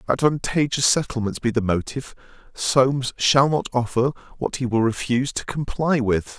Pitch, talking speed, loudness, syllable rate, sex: 125 Hz, 160 wpm, -21 LUFS, 5.3 syllables/s, male